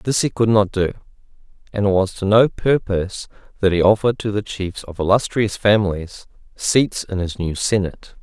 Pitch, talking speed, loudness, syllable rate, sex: 100 Hz, 180 wpm, -19 LUFS, 5.2 syllables/s, male